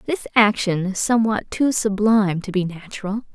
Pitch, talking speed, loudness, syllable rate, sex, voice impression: 205 Hz, 160 wpm, -20 LUFS, 5.3 syllables/s, female, very feminine, slightly adult-like, slightly cute, slightly sweet